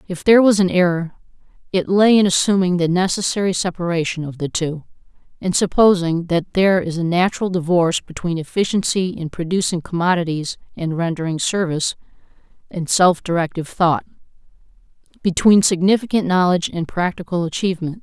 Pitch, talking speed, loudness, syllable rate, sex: 175 Hz, 135 wpm, -18 LUFS, 5.8 syllables/s, female